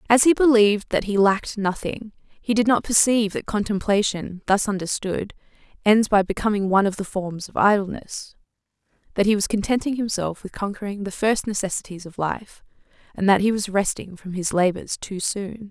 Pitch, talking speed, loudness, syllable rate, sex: 205 Hz, 175 wpm, -22 LUFS, 5.4 syllables/s, female